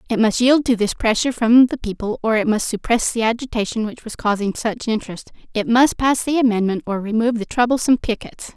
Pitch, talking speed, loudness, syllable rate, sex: 225 Hz, 210 wpm, -19 LUFS, 6.0 syllables/s, female